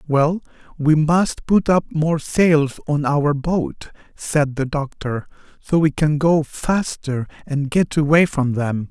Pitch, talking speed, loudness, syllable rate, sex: 150 Hz, 155 wpm, -19 LUFS, 3.5 syllables/s, male